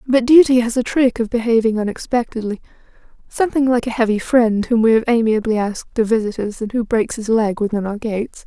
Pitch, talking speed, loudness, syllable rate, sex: 230 Hz, 200 wpm, -17 LUFS, 5.9 syllables/s, female